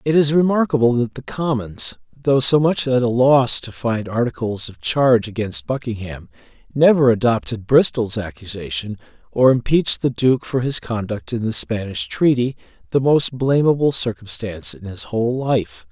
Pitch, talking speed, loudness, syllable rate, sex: 125 Hz, 160 wpm, -18 LUFS, 4.8 syllables/s, male